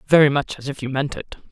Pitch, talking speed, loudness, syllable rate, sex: 140 Hz, 275 wpm, -21 LUFS, 6.4 syllables/s, female